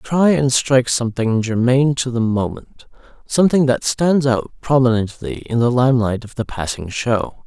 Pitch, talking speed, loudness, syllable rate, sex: 125 Hz, 160 wpm, -17 LUFS, 4.9 syllables/s, male